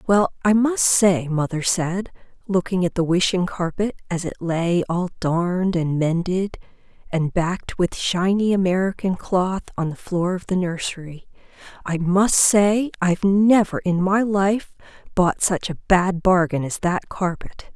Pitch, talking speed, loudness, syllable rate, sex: 185 Hz, 150 wpm, -20 LUFS, 4.2 syllables/s, female